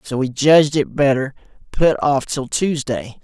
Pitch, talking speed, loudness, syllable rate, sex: 140 Hz, 165 wpm, -17 LUFS, 4.4 syllables/s, male